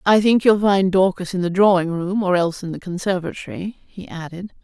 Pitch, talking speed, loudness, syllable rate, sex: 185 Hz, 205 wpm, -19 LUFS, 5.4 syllables/s, female